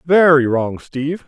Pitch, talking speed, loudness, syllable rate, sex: 150 Hz, 140 wpm, -16 LUFS, 4.3 syllables/s, male